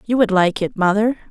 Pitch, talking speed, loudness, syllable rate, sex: 210 Hz, 230 wpm, -17 LUFS, 5.0 syllables/s, female